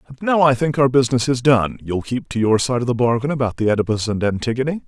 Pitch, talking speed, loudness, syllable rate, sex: 125 Hz, 260 wpm, -18 LUFS, 6.5 syllables/s, male